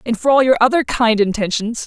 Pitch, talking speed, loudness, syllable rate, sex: 235 Hz, 225 wpm, -15 LUFS, 5.9 syllables/s, female